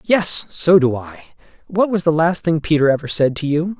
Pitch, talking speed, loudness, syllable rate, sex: 160 Hz, 220 wpm, -17 LUFS, 4.9 syllables/s, male